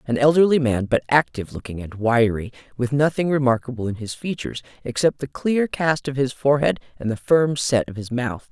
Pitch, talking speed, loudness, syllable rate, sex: 130 Hz, 195 wpm, -21 LUFS, 5.6 syllables/s, female